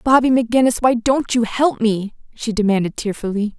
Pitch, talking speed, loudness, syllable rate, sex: 230 Hz, 170 wpm, -18 LUFS, 5.5 syllables/s, female